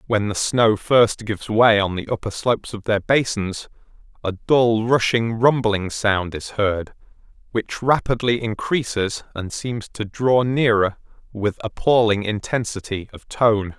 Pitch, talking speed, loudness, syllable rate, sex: 110 Hz, 145 wpm, -20 LUFS, 4.1 syllables/s, male